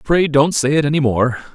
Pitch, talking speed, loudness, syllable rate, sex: 140 Hz, 235 wpm, -16 LUFS, 5.3 syllables/s, male